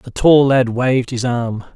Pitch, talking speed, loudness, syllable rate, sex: 125 Hz, 205 wpm, -15 LUFS, 4.2 syllables/s, male